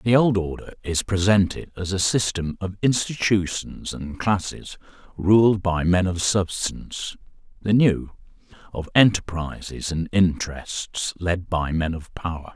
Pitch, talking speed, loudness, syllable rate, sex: 95 Hz, 135 wpm, -23 LUFS, 4.0 syllables/s, male